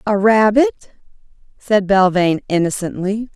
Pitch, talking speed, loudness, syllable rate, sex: 205 Hz, 90 wpm, -16 LUFS, 4.9 syllables/s, female